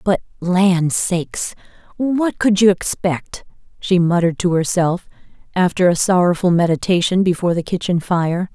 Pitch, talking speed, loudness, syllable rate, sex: 180 Hz, 135 wpm, -17 LUFS, 4.7 syllables/s, female